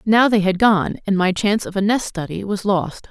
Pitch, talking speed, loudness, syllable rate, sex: 200 Hz, 250 wpm, -18 LUFS, 5.2 syllables/s, female